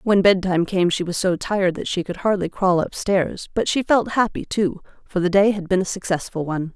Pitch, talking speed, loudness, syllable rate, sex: 190 Hz, 230 wpm, -21 LUFS, 5.5 syllables/s, female